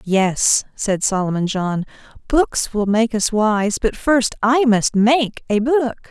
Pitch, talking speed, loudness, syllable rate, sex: 220 Hz, 155 wpm, -18 LUFS, 3.3 syllables/s, female